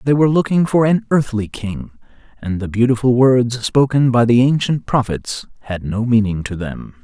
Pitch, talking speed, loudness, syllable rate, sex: 120 Hz, 180 wpm, -16 LUFS, 4.9 syllables/s, male